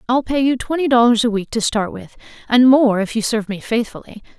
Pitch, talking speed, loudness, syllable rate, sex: 235 Hz, 235 wpm, -17 LUFS, 5.9 syllables/s, female